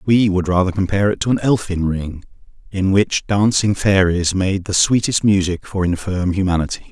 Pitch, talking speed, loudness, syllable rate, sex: 95 Hz, 175 wpm, -17 LUFS, 5.1 syllables/s, male